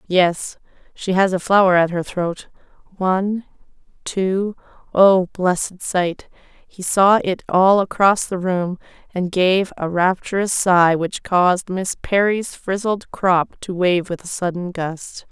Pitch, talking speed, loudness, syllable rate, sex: 185 Hz, 145 wpm, -18 LUFS, 3.7 syllables/s, female